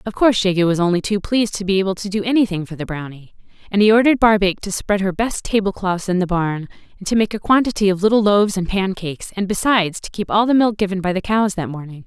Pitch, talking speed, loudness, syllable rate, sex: 195 Hz, 260 wpm, -18 LUFS, 6.6 syllables/s, female